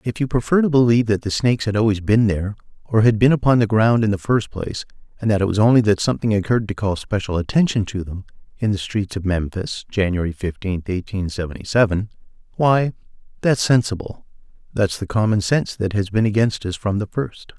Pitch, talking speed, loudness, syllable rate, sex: 105 Hz, 205 wpm, -19 LUFS, 6.0 syllables/s, male